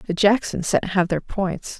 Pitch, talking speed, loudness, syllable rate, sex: 190 Hz, 200 wpm, -21 LUFS, 4.3 syllables/s, female